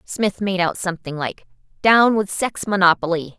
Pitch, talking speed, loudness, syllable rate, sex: 185 Hz, 160 wpm, -19 LUFS, 4.8 syllables/s, female